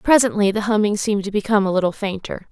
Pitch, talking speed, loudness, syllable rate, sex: 205 Hz, 215 wpm, -19 LUFS, 7.1 syllables/s, female